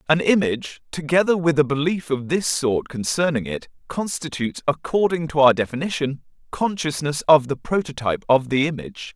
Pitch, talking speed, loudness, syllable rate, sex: 150 Hz, 150 wpm, -21 LUFS, 5.4 syllables/s, male